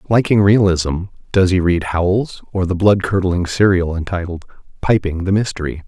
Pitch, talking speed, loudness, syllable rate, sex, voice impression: 95 Hz, 155 wpm, -16 LUFS, 5.2 syllables/s, male, very masculine, very adult-like, old, very thick, relaxed, very powerful, bright, very soft, very muffled, fluent, raspy, very cool, very intellectual, sincere, very calm, very mature, very friendly, very reassuring, very unique, very elegant, wild, very sweet, slightly lively, very kind, modest